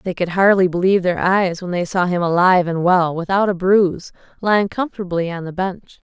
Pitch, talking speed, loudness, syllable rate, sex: 180 Hz, 205 wpm, -17 LUFS, 5.7 syllables/s, female